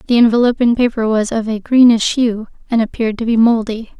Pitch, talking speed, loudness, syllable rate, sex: 230 Hz, 195 wpm, -14 LUFS, 5.8 syllables/s, female